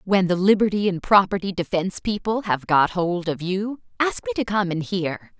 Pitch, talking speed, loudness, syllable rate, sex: 195 Hz, 190 wpm, -22 LUFS, 5.1 syllables/s, female